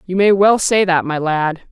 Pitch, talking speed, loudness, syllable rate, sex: 180 Hz, 245 wpm, -15 LUFS, 4.7 syllables/s, female